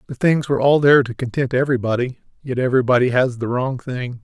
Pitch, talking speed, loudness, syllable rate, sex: 130 Hz, 200 wpm, -18 LUFS, 6.5 syllables/s, male